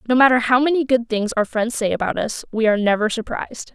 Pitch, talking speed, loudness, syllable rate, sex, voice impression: 235 Hz, 240 wpm, -19 LUFS, 6.2 syllables/s, female, very feminine, very adult-like, thin, tensed, slightly powerful, slightly bright, slightly hard, clear, fluent, very cool, very intellectual, very refreshing, very sincere, calm, very friendly, very reassuring, unique, very elegant, slightly wild, sweet, lively, slightly strict, slightly intense, light